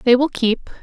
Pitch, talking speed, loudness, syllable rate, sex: 250 Hz, 220 wpm, -18 LUFS, 6.0 syllables/s, female